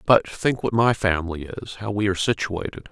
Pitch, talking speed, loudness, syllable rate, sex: 100 Hz, 185 wpm, -23 LUFS, 5.8 syllables/s, male